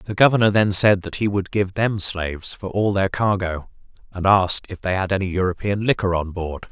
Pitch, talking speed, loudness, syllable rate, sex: 95 Hz, 215 wpm, -20 LUFS, 5.3 syllables/s, male